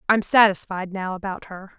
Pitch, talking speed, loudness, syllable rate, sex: 195 Hz, 170 wpm, -21 LUFS, 5.0 syllables/s, female